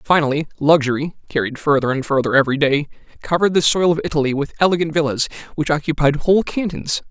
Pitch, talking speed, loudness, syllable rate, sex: 150 Hz, 170 wpm, -18 LUFS, 6.6 syllables/s, male